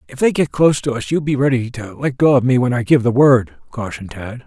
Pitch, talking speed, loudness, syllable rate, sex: 125 Hz, 280 wpm, -16 LUFS, 6.0 syllables/s, male